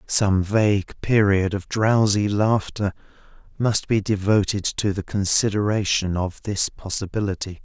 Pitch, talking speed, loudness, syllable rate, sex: 100 Hz, 120 wpm, -21 LUFS, 4.2 syllables/s, male